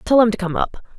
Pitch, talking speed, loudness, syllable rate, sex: 215 Hz, 305 wpm, -19 LUFS, 6.9 syllables/s, female